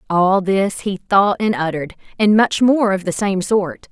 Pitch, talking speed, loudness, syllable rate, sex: 195 Hz, 200 wpm, -17 LUFS, 4.4 syllables/s, female